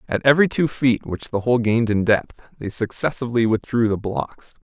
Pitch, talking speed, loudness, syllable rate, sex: 115 Hz, 195 wpm, -20 LUFS, 5.3 syllables/s, male